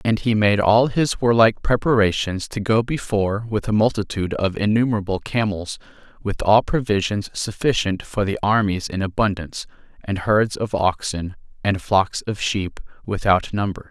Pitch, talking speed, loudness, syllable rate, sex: 105 Hz, 150 wpm, -20 LUFS, 4.9 syllables/s, male